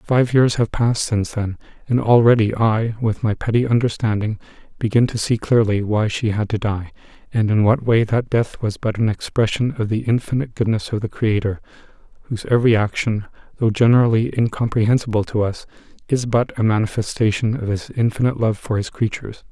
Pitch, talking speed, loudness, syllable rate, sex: 110 Hz, 180 wpm, -19 LUFS, 5.7 syllables/s, male